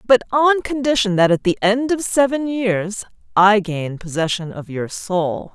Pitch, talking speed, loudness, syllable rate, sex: 215 Hz, 175 wpm, -18 LUFS, 4.2 syllables/s, female